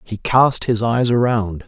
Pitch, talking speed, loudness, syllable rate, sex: 115 Hz, 180 wpm, -17 LUFS, 3.9 syllables/s, male